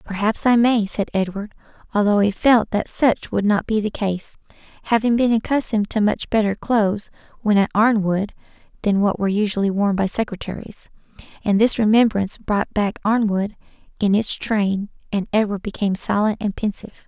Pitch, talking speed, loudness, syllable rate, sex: 210 Hz, 165 wpm, -20 LUFS, 5.3 syllables/s, female